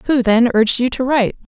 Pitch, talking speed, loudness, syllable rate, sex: 245 Hz, 235 wpm, -15 LUFS, 6.1 syllables/s, female